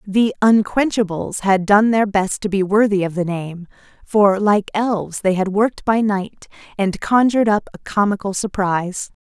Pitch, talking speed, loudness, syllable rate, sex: 200 Hz, 170 wpm, -18 LUFS, 4.6 syllables/s, female